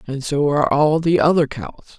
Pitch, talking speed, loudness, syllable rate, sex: 145 Hz, 210 wpm, -17 LUFS, 5.7 syllables/s, female